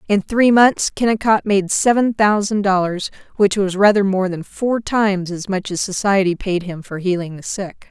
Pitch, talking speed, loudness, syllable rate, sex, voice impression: 200 Hz, 190 wpm, -17 LUFS, 4.7 syllables/s, female, feminine, adult-like, tensed, slightly powerful, clear, slightly nasal, intellectual, calm, friendly, reassuring, slightly sharp